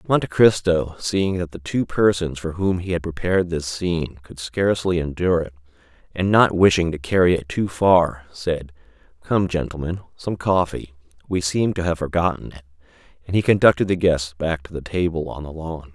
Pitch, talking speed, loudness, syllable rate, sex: 85 Hz, 180 wpm, -21 LUFS, 5.3 syllables/s, male